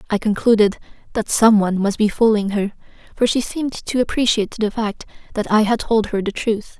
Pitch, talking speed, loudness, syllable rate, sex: 215 Hz, 195 wpm, -18 LUFS, 5.6 syllables/s, female